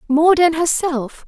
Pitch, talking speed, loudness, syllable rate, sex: 310 Hz, 140 wpm, -16 LUFS, 3.7 syllables/s, female